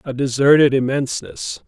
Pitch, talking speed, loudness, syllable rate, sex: 135 Hz, 105 wpm, -17 LUFS, 5.2 syllables/s, male